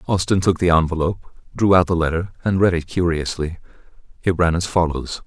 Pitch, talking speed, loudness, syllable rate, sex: 85 Hz, 180 wpm, -19 LUFS, 5.7 syllables/s, male